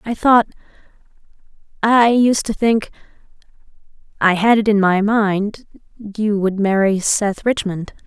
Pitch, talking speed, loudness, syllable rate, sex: 210 Hz, 110 wpm, -16 LUFS, 4.0 syllables/s, female